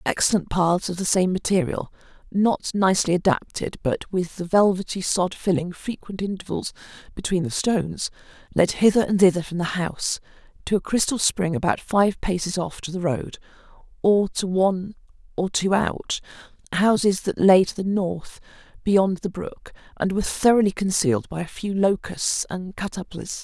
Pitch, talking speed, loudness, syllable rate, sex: 185 Hz, 160 wpm, -23 LUFS, 4.9 syllables/s, female